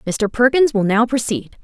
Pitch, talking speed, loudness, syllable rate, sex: 230 Hz, 185 wpm, -16 LUFS, 4.7 syllables/s, female